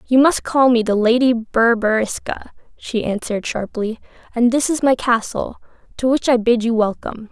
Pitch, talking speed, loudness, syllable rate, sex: 235 Hz, 170 wpm, -18 LUFS, 5.1 syllables/s, female